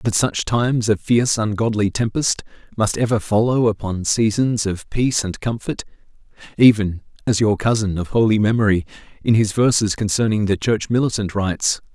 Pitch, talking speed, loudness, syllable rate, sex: 110 Hz, 150 wpm, -19 LUFS, 5.3 syllables/s, male